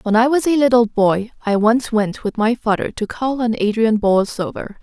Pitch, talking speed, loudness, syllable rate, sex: 225 Hz, 210 wpm, -17 LUFS, 4.8 syllables/s, female